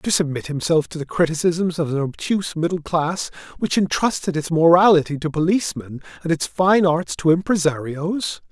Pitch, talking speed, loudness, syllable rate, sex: 165 Hz, 160 wpm, -20 LUFS, 5.2 syllables/s, male